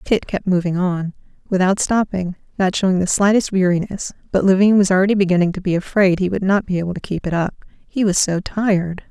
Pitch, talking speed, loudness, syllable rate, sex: 190 Hz, 210 wpm, -18 LUFS, 5.9 syllables/s, female